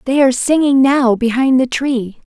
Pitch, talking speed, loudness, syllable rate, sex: 260 Hz, 180 wpm, -14 LUFS, 4.8 syllables/s, female